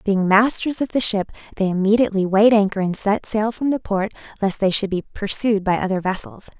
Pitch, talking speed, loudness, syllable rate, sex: 205 Hz, 210 wpm, -19 LUFS, 5.8 syllables/s, female